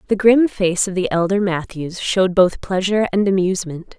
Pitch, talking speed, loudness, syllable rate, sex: 190 Hz, 180 wpm, -17 LUFS, 5.4 syllables/s, female